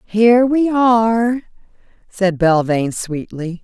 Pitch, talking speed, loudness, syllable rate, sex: 205 Hz, 100 wpm, -16 LUFS, 3.9 syllables/s, female